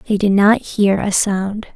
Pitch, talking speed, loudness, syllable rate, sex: 205 Hz, 205 wpm, -16 LUFS, 4.0 syllables/s, female